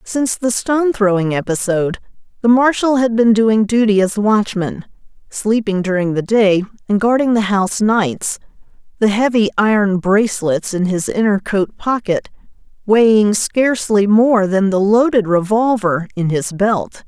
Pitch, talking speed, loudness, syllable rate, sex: 210 Hz, 145 wpm, -15 LUFS, 4.5 syllables/s, female